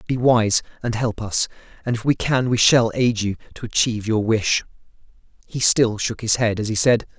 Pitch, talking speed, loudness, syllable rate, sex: 115 Hz, 210 wpm, -20 LUFS, 5.1 syllables/s, male